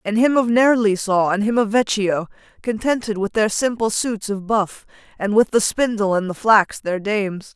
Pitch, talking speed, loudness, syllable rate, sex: 210 Hz, 200 wpm, -19 LUFS, 4.7 syllables/s, female